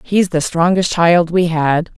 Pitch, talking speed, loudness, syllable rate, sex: 170 Hz, 180 wpm, -14 LUFS, 3.8 syllables/s, female